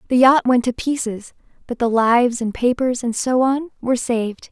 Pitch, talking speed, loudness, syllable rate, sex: 245 Hz, 200 wpm, -18 LUFS, 5.2 syllables/s, female